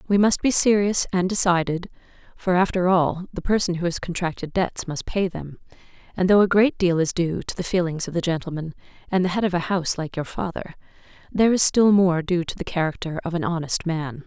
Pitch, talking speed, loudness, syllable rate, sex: 175 Hz, 220 wpm, -22 LUFS, 5.7 syllables/s, female